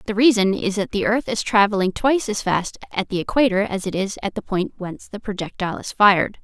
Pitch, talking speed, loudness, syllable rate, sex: 200 Hz, 235 wpm, -20 LUFS, 6.0 syllables/s, female